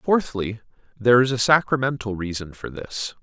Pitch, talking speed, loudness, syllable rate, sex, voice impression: 120 Hz, 150 wpm, -22 LUFS, 5.0 syllables/s, male, masculine, adult-like, tensed, powerful, fluent, intellectual, calm, mature, slightly reassuring, wild, lively, slightly strict